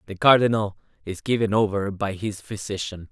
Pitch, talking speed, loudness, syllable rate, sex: 105 Hz, 155 wpm, -23 LUFS, 5.3 syllables/s, male